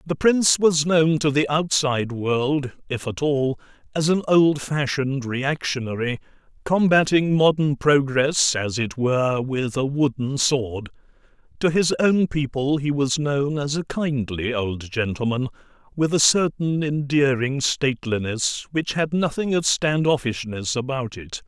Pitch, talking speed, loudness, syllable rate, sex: 140 Hz, 135 wpm, -21 LUFS, 4.2 syllables/s, male